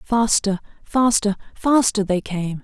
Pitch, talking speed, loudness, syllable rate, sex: 210 Hz, 115 wpm, -20 LUFS, 3.8 syllables/s, female